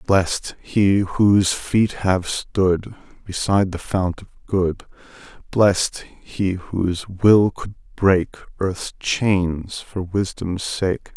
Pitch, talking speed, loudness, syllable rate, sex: 95 Hz, 120 wpm, -20 LUFS, 3.0 syllables/s, male